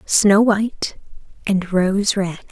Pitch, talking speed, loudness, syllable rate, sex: 200 Hz, 120 wpm, -18 LUFS, 3.3 syllables/s, female